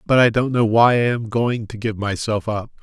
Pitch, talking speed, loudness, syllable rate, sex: 110 Hz, 255 wpm, -19 LUFS, 5.0 syllables/s, male